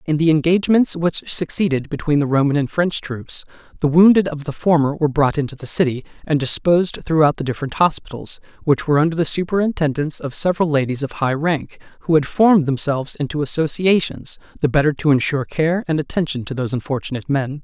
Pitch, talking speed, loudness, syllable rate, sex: 150 Hz, 185 wpm, -18 LUFS, 6.3 syllables/s, male